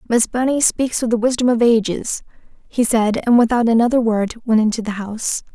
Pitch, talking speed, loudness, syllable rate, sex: 230 Hz, 195 wpm, -17 LUFS, 5.5 syllables/s, female